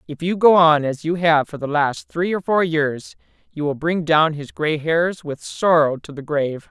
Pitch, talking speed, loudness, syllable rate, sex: 155 Hz, 235 wpm, -19 LUFS, 4.5 syllables/s, female